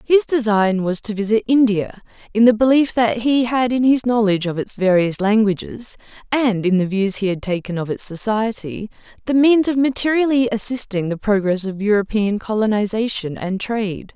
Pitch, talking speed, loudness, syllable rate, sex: 220 Hz, 175 wpm, -18 LUFS, 5.1 syllables/s, female